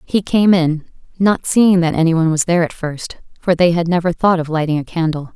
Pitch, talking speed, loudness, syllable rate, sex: 170 Hz, 235 wpm, -16 LUFS, 5.7 syllables/s, female